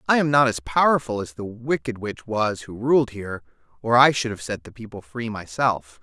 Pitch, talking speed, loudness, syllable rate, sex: 115 Hz, 220 wpm, -22 LUFS, 5.1 syllables/s, male